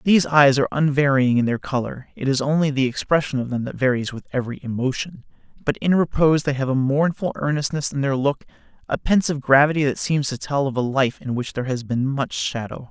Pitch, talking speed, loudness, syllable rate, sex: 140 Hz, 220 wpm, -21 LUFS, 6.0 syllables/s, male